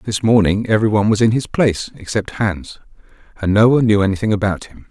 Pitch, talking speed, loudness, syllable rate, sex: 105 Hz, 195 wpm, -16 LUFS, 6.1 syllables/s, male